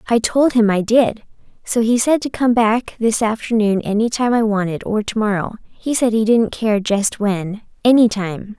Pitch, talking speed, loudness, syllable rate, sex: 220 Hz, 180 wpm, -17 LUFS, 4.5 syllables/s, female